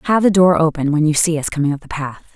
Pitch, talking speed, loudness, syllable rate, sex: 160 Hz, 305 wpm, -16 LUFS, 6.7 syllables/s, female